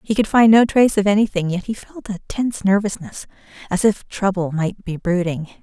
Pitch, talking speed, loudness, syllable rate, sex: 195 Hz, 205 wpm, -18 LUFS, 5.5 syllables/s, female